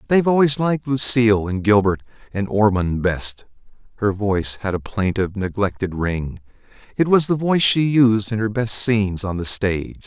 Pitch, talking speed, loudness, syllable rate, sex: 110 Hz, 175 wpm, -19 LUFS, 5.2 syllables/s, male